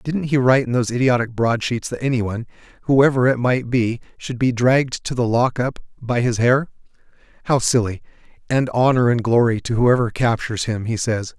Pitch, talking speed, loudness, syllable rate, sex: 120 Hz, 180 wpm, -19 LUFS, 5.4 syllables/s, male